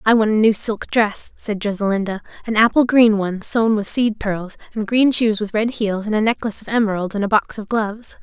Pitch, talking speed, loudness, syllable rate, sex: 215 Hz, 235 wpm, -18 LUFS, 5.5 syllables/s, female